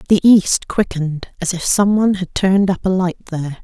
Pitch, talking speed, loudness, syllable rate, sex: 185 Hz, 200 wpm, -16 LUFS, 5.5 syllables/s, female